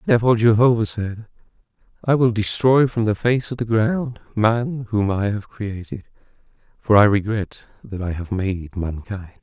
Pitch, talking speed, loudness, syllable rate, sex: 110 Hz, 160 wpm, -20 LUFS, 4.7 syllables/s, male